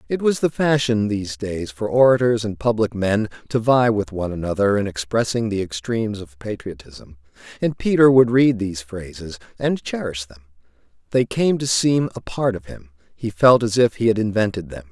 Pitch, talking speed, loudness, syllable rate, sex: 110 Hz, 190 wpm, -20 LUFS, 5.2 syllables/s, male